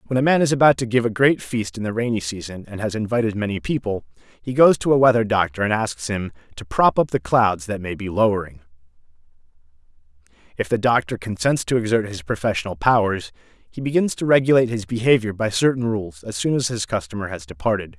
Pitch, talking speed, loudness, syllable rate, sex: 110 Hz, 205 wpm, -20 LUFS, 6.0 syllables/s, male